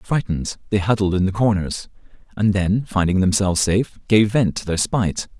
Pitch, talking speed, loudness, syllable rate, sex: 100 Hz, 180 wpm, -19 LUFS, 5.5 syllables/s, male